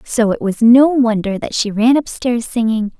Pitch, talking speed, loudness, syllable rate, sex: 235 Hz, 220 wpm, -14 LUFS, 4.5 syllables/s, female